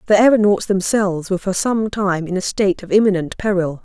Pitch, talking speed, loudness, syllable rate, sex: 195 Hz, 205 wpm, -17 LUFS, 6.0 syllables/s, female